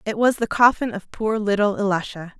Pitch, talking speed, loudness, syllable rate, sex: 210 Hz, 200 wpm, -20 LUFS, 5.4 syllables/s, female